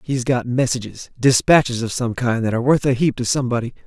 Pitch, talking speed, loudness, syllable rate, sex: 125 Hz, 215 wpm, -19 LUFS, 6.1 syllables/s, male